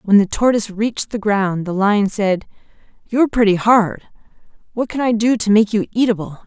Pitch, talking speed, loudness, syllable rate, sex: 210 Hz, 185 wpm, -17 LUFS, 5.4 syllables/s, female